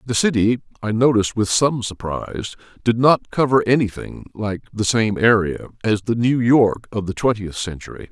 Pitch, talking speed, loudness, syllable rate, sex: 110 Hz, 170 wpm, -19 LUFS, 4.9 syllables/s, male